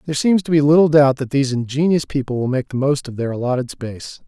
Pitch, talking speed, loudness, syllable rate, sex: 140 Hz, 255 wpm, -17 LUFS, 6.6 syllables/s, male